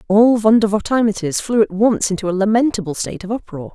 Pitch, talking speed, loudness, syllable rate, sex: 210 Hz, 175 wpm, -17 LUFS, 6.2 syllables/s, female